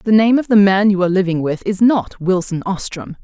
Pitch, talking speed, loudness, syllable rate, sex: 195 Hz, 240 wpm, -15 LUFS, 5.4 syllables/s, female